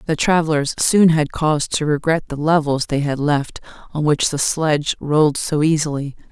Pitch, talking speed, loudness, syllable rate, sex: 150 Hz, 180 wpm, -18 LUFS, 5.0 syllables/s, female